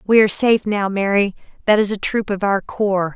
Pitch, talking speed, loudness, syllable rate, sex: 205 Hz, 230 wpm, -18 LUFS, 5.5 syllables/s, female